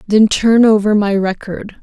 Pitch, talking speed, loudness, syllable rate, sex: 210 Hz, 165 wpm, -12 LUFS, 4.1 syllables/s, female